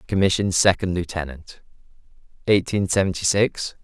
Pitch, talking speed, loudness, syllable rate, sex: 90 Hz, 95 wpm, -21 LUFS, 5.4 syllables/s, male